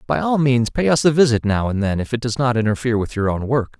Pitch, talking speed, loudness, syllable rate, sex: 120 Hz, 300 wpm, -18 LUFS, 6.3 syllables/s, male